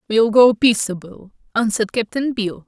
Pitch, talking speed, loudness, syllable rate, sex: 220 Hz, 135 wpm, -17 LUFS, 4.4 syllables/s, female